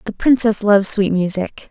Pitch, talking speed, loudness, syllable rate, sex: 205 Hz, 175 wpm, -16 LUFS, 5.1 syllables/s, female